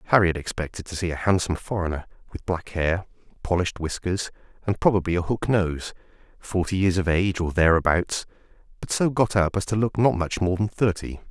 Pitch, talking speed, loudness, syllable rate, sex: 90 Hz, 185 wpm, -24 LUFS, 5.9 syllables/s, male